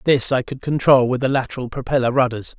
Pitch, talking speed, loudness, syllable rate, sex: 130 Hz, 210 wpm, -19 LUFS, 6.1 syllables/s, male